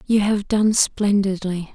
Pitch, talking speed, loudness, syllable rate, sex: 200 Hz, 140 wpm, -19 LUFS, 3.7 syllables/s, female